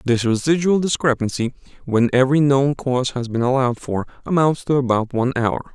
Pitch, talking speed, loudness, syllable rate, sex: 130 Hz, 165 wpm, -19 LUFS, 5.9 syllables/s, male